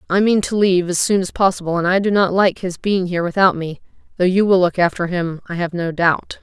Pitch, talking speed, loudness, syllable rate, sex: 180 Hz, 260 wpm, -17 LUFS, 5.9 syllables/s, female